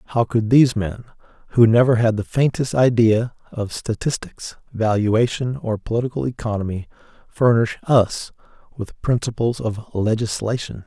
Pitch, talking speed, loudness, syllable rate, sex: 115 Hz, 120 wpm, -20 LUFS, 4.6 syllables/s, male